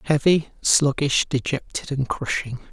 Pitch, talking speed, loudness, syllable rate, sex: 140 Hz, 110 wpm, -22 LUFS, 4.2 syllables/s, male